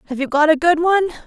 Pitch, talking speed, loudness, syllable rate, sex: 315 Hz, 285 wpm, -16 LUFS, 8.0 syllables/s, female